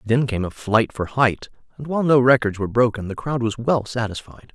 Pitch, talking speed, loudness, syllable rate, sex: 120 Hz, 225 wpm, -20 LUFS, 5.5 syllables/s, male